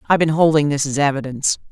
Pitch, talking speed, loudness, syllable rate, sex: 145 Hz, 210 wpm, -17 LUFS, 7.3 syllables/s, female